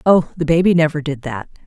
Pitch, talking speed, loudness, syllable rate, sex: 155 Hz, 215 wpm, -17 LUFS, 5.9 syllables/s, female